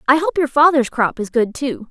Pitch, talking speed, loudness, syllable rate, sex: 275 Hz, 250 wpm, -17 LUFS, 5.4 syllables/s, female